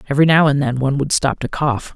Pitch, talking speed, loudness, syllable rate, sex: 140 Hz, 275 wpm, -16 LUFS, 6.7 syllables/s, male